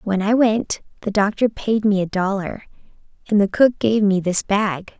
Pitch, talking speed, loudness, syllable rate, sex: 205 Hz, 190 wpm, -19 LUFS, 4.5 syllables/s, female